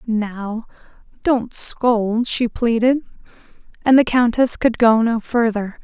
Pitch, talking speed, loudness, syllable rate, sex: 230 Hz, 125 wpm, -18 LUFS, 3.5 syllables/s, female